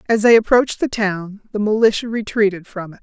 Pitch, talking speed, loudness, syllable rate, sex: 210 Hz, 200 wpm, -17 LUFS, 5.9 syllables/s, female